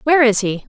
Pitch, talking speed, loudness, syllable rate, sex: 245 Hz, 240 wpm, -16 LUFS, 6.8 syllables/s, female